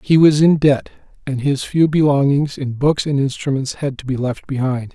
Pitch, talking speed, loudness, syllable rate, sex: 140 Hz, 205 wpm, -17 LUFS, 4.9 syllables/s, male